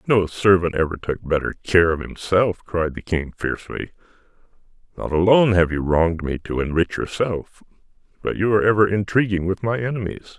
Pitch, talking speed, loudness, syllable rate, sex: 95 Hz, 170 wpm, -20 LUFS, 5.5 syllables/s, male